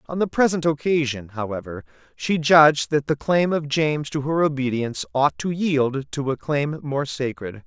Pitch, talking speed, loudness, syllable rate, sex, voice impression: 145 Hz, 180 wpm, -22 LUFS, 4.8 syllables/s, male, masculine, adult-like, thick, tensed, powerful, bright, clear, cool, intellectual, friendly, wild, lively, slightly kind